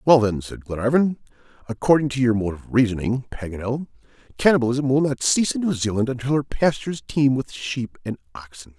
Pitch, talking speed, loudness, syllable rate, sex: 125 Hz, 180 wpm, -22 LUFS, 5.8 syllables/s, male